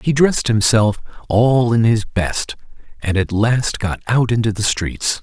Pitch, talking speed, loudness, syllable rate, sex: 115 Hz, 170 wpm, -17 LUFS, 4.1 syllables/s, male